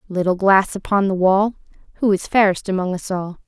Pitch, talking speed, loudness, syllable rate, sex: 190 Hz, 190 wpm, -18 LUFS, 5.5 syllables/s, female